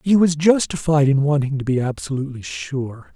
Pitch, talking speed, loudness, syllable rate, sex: 140 Hz, 170 wpm, -19 LUFS, 5.3 syllables/s, male